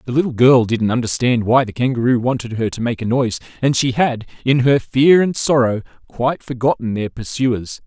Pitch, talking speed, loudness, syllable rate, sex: 125 Hz, 200 wpm, -17 LUFS, 5.4 syllables/s, male